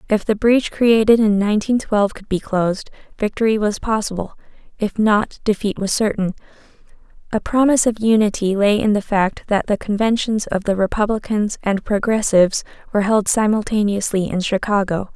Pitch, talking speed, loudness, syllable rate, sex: 210 Hz, 155 wpm, -18 LUFS, 5.4 syllables/s, female